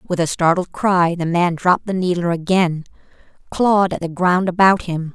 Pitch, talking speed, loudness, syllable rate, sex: 175 Hz, 185 wpm, -17 LUFS, 5.0 syllables/s, female